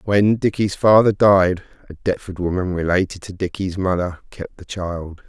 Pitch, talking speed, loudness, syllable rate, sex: 95 Hz, 160 wpm, -19 LUFS, 4.7 syllables/s, male